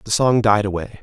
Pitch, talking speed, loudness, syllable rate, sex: 105 Hz, 235 wpm, -17 LUFS, 5.6 syllables/s, male